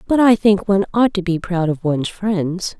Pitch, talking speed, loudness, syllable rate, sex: 190 Hz, 235 wpm, -17 LUFS, 5.1 syllables/s, female